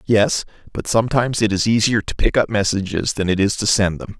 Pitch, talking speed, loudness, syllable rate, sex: 105 Hz, 230 wpm, -18 LUFS, 5.8 syllables/s, male